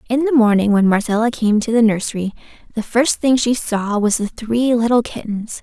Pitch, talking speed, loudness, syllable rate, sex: 225 Hz, 205 wpm, -17 LUFS, 5.2 syllables/s, female